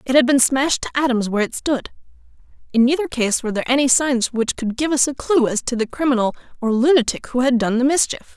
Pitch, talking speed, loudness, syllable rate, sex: 255 Hz, 235 wpm, -18 LUFS, 6.4 syllables/s, female